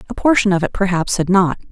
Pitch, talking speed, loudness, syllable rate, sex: 190 Hz, 245 wpm, -16 LUFS, 6.4 syllables/s, female